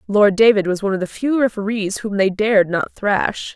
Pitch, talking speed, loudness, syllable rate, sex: 205 Hz, 220 wpm, -18 LUFS, 5.3 syllables/s, female